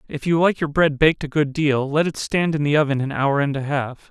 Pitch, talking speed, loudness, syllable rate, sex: 145 Hz, 290 wpm, -20 LUFS, 5.6 syllables/s, male